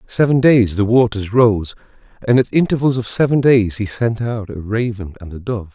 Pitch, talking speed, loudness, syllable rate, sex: 110 Hz, 200 wpm, -16 LUFS, 5.0 syllables/s, male